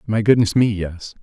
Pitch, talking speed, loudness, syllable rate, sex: 105 Hz, 195 wpm, -17 LUFS, 4.9 syllables/s, male